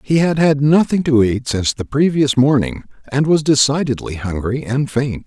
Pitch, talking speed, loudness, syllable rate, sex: 135 Hz, 180 wpm, -16 LUFS, 4.9 syllables/s, male